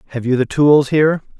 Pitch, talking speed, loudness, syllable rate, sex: 140 Hz, 215 wpm, -14 LUFS, 6.3 syllables/s, male